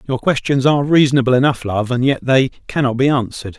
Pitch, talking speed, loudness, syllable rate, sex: 130 Hz, 200 wpm, -16 LUFS, 6.2 syllables/s, male